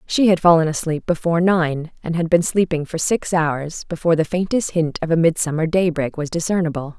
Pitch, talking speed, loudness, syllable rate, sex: 165 Hz, 195 wpm, -19 LUFS, 5.5 syllables/s, female